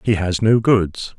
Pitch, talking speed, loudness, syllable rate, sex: 100 Hz, 200 wpm, -17 LUFS, 3.7 syllables/s, male